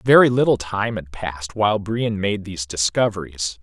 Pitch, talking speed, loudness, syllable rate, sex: 100 Hz, 165 wpm, -21 LUFS, 5.1 syllables/s, male